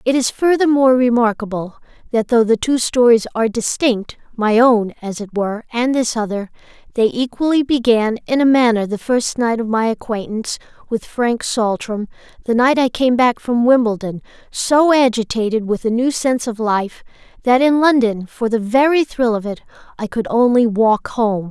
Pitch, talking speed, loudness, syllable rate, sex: 235 Hz, 170 wpm, -16 LUFS, 5.0 syllables/s, female